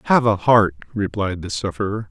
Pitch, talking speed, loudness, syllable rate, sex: 100 Hz, 170 wpm, -20 LUFS, 5.2 syllables/s, male